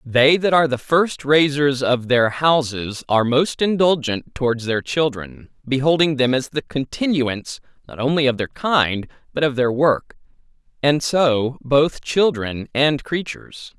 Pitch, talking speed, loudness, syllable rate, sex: 140 Hz, 150 wpm, -19 LUFS, 4.3 syllables/s, male